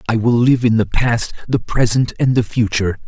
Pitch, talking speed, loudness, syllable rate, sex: 115 Hz, 215 wpm, -16 LUFS, 5.2 syllables/s, male